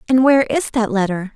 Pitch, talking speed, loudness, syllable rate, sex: 235 Hz, 220 wpm, -16 LUFS, 6.9 syllables/s, female